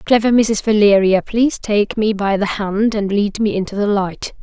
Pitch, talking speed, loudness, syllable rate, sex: 210 Hz, 205 wpm, -16 LUFS, 4.7 syllables/s, female